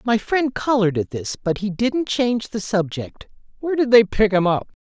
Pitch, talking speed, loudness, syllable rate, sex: 220 Hz, 210 wpm, -20 LUFS, 5.2 syllables/s, female